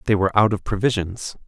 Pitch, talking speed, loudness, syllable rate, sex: 100 Hz, 205 wpm, -20 LUFS, 6.6 syllables/s, male